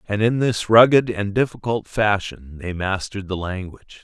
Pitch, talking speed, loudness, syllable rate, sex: 105 Hz, 165 wpm, -20 LUFS, 4.8 syllables/s, male